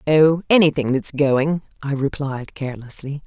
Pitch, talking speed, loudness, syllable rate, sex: 145 Hz, 130 wpm, -20 LUFS, 4.6 syllables/s, female